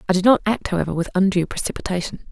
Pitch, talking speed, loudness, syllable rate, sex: 185 Hz, 210 wpm, -20 LUFS, 7.4 syllables/s, female